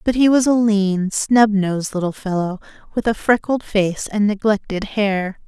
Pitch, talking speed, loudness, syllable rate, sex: 205 Hz, 175 wpm, -18 LUFS, 4.4 syllables/s, female